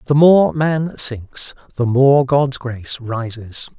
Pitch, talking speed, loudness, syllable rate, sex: 130 Hz, 145 wpm, -17 LUFS, 3.3 syllables/s, male